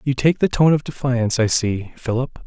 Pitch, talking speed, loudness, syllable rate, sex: 130 Hz, 220 wpm, -19 LUFS, 5.1 syllables/s, male